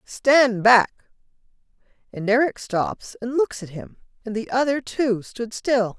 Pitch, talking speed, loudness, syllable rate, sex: 235 Hz, 150 wpm, -21 LUFS, 3.9 syllables/s, female